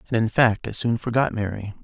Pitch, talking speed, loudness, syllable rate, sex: 115 Hz, 230 wpm, -22 LUFS, 5.7 syllables/s, male